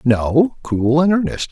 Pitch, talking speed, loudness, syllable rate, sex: 150 Hz, 160 wpm, -16 LUFS, 3.7 syllables/s, male